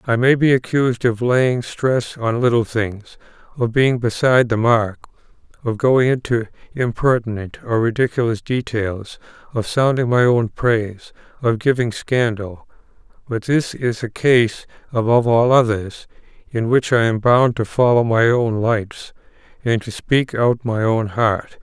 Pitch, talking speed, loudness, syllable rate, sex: 115 Hz, 155 wpm, -18 LUFS, 4.3 syllables/s, male